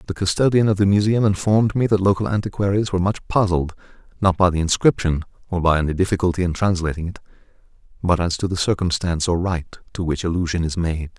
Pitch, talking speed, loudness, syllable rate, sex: 90 Hz, 195 wpm, -20 LUFS, 6.5 syllables/s, male